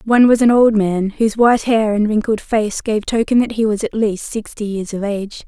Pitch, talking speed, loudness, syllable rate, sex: 215 Hz, 240 wpm, -16 LUFS, 5.4 syllables/s, female